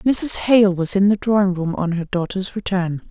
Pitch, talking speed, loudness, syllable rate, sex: 190 Hz, 215 wpm, -19 LUFS, 4.6 syllables/s, female